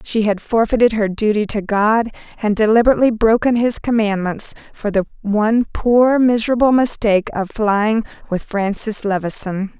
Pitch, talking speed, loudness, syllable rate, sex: 220 Hz, 140 wpm, -17 LUFS, 5.0 syllables/s, female